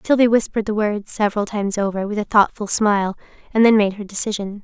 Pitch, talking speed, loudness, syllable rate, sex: 210 Hz, 205 wpm, -19 LUFS, 6.5 syllables/s, female